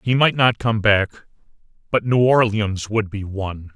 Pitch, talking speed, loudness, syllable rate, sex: 110 Hz, 175 wpm, -19 LUFS, 4.0 syllables/s, male